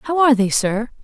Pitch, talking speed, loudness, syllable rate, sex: 250 Hz, 230 wpm, -17 LUFS, 5.5 syllables/s, female